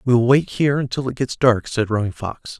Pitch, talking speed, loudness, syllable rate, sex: 125 Hz, 255 wpm, -19 LUFS, 5.6 syllables/s, male